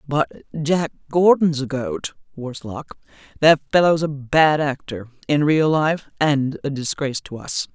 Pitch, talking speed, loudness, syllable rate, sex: 145 Hz, 140 wpm, -20 LUFS, 4.3 syllables/s, female